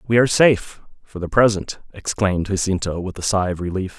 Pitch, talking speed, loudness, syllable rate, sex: 100 Hz, 180 wpm, -19 LUFS, 6.0 syllables/s, male